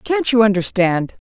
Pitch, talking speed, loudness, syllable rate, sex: 215 Hz, 140 wpm, -16 LUFS, 4.6 syllables/s, female